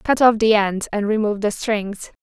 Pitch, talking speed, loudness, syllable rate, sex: 210 Hz, 215 wpm, -19 LUFS, 5.0 syllables/s, female